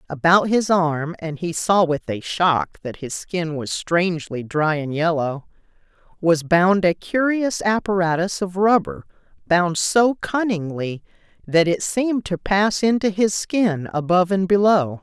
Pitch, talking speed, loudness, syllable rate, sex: 180 Hz, 145 wpm, -20 LUFS, 4.1 syllables/s, female